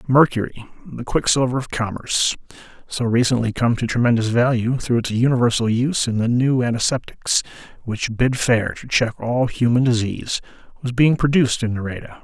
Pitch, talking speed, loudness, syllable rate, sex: 120 Hz, 140 wpm, -19 LUFS, 5.4 syllables/s, male